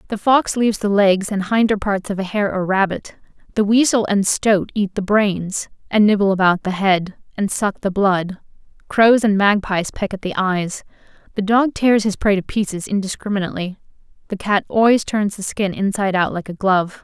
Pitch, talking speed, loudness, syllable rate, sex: 200 Hz, 195 wpm, -18 LUFS, 5.1 syllables/s, female